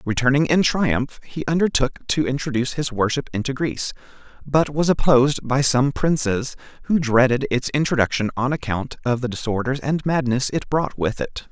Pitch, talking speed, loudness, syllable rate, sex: 135 Hz, 165 wpm, -21 LUFS, 5.1 syllables/s, male